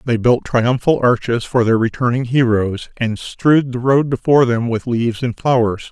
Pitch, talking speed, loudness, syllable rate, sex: 120 Hz, 185 wpm, -16 LUFS, 4.9 syllables/s, male